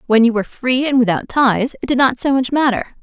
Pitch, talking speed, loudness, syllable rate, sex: 245 Hz, 260 wpm, -16 LUFS, 5.7 syllables/s, female